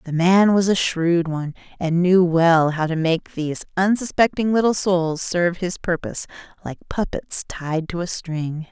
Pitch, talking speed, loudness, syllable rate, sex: 175 Hz, 170 wpm, -20 LUFS, 4.6 syllables/s, female